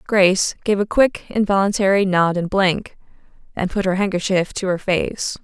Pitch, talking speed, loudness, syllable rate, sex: 190 Hz, 165 wpm, -19 LUFS, 4.8 syllables/s, female